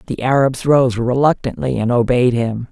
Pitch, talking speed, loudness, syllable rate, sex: 125 Hz, 155 wpm, -16 LUFS, 4.7 syllables/s, female